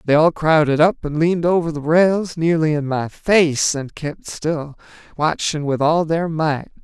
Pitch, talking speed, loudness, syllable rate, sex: 155 Hz, 185 wpm, -18 LUFS, 4.3 syllables/s, male